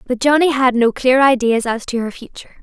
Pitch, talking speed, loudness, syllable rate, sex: 250 Hz, 230 wpm, -15 LUFS, 5.9 syllables/s, female